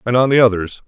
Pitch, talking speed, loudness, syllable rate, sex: 115 Hz, 275 wpm, -14 LUFS, 6.9 syllables/s, male